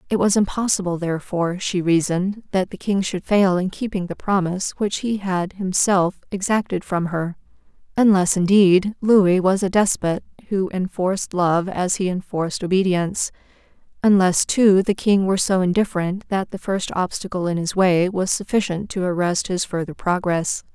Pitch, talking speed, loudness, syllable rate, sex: 185 Hz, 160 wpm, -20 LUFS, 5.0 syllables/s, female